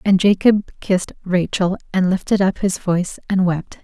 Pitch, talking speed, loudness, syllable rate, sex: 190 Hz, 170 wpm, -18 LUFS, 4.9 syllables/s, female